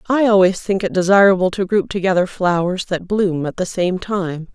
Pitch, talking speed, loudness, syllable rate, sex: 190 Hz, 200 wpm, -17 LUFS, 5.1 syllables/s, female